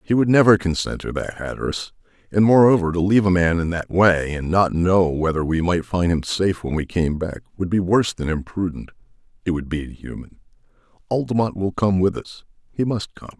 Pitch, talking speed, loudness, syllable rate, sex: 90 Hz, 205 wpm, -20 LUFS, 5.6 syllables/s, male